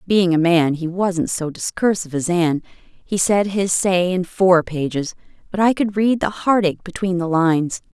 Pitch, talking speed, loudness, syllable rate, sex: 180 Hz, 190 wpm, -19 LUFS, 4.7 syllables/s, female